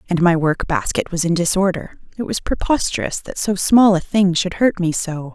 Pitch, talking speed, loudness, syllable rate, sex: 185 Hz, 215 wpm, -18 LUFS, 5.1 syllables/s, female